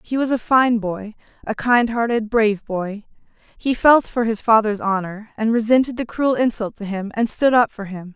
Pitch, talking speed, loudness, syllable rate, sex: 225 Hz, 205 wpm, -19 LUFS, 4.9 syllables/s, female